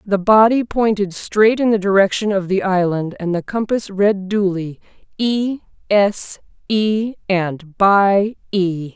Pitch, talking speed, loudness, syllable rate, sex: 200 Hz, 140 wpm, -17 LUFS, 3.7 syllables/s, female